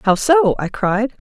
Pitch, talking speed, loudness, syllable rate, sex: 235 Hz, 190 wpm, -16 LUFS, 3.8 syllables/s, female